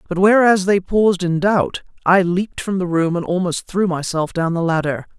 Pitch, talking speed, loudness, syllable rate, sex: 180 Hz, 210 wpm, -17 LUFS, 5.1 syllables/s, female